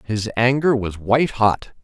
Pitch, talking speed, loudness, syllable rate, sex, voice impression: 115 Hz, 165 wpm, -19 LUFS, 4.2 syllables/s, male, masculine, middle-aged, tensed, hard, fluent, intellectual, mature, wild, lively, strict, sharp